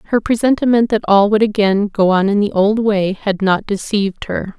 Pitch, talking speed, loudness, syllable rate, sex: 205 Hz, 210 wpm, -15 LUFS, 5.2 syllables/s, female